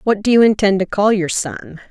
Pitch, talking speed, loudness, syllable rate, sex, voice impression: 200 Hz, 250 wpm, -15 LUFS, 5.2 syllables/s, female, feminine, adult-like, slightly clear, slightly intellectual, slightly sharp